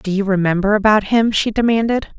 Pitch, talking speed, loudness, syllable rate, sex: 210 Hz, 190 wpm, -16 LUFS, 5.6 syllables/s, female